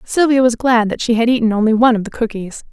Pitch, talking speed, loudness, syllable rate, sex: 230 Hz, 265 wpm, -15 LUFS, 6.7 syllables/s, female